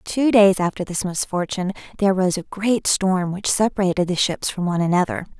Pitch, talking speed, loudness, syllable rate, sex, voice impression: 190 Hz, 190 wpm, -20 LUFS, 6.1 syllables/s, female, very feminine, slightly young, very thin, very tensed, very powerful, very bright, soft, very clear, very fluent, slightly raspy, very cute, intellectual, very refreshing, sincere, calm, very friendly, very reassuring, very unique, very elegant, slightly wild, very sweet, very lively, very kind, slightly intense, very light